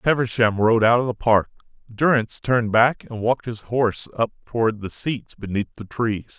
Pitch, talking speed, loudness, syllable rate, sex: 115 Hz, 190 wpm, -21 LUFS, 5.4 syllables/s, male